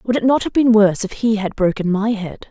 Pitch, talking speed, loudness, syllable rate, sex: 215 Hz, 290 wpm, -17 LUFS, 5.7 syllables/s, female